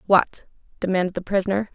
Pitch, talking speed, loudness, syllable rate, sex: 195 Hz, 135 wpm, -22 LUFS, 6.4 syllables/s, female